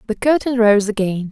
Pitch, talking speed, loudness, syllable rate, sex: 220 Hz, 185 wpm, -16 LUFS, 5.3 syllables/s, female